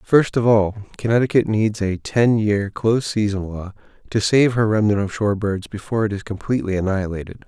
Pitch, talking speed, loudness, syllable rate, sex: 105 Hz, 185 wpm, -20 LUFS, 5.8 syllables/s, male